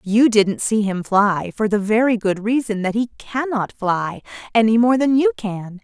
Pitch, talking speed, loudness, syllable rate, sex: 220 Hz, 195 wpm, -18 LUFS, 4.4 syllables/s, female